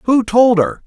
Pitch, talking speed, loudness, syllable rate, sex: 225 Hz, 210 wpm, -13 LUFS, 3.7 syllables/s, female